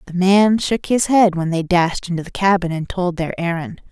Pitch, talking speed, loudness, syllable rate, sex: 180 Hz, 245 wpm, -17 LUFS, 5.1 syllables/s, female